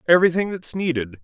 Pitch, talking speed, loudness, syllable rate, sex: 165 Hz, 145 wpm, -21 LUFS, 6.7 syllables/s, male